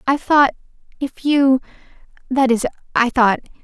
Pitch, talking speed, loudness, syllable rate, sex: 260 Hz, 130 wpm, -17 LUFS, 4.4 syllables/s, female